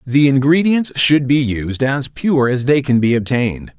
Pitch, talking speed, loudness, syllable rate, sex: 130 Hz, 190 wpm, -15 LUFS, 4.4 syllables/s, male